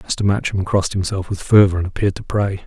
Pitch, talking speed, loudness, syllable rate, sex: 95 Hz, 225 wpm, -18 LUFS, 6.8 syllables/s, male